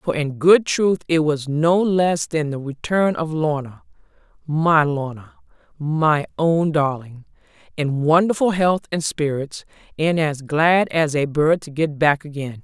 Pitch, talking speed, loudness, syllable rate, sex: 155 Hz, 150 wpm, -19 LUFS, 3.9 syllables/s, female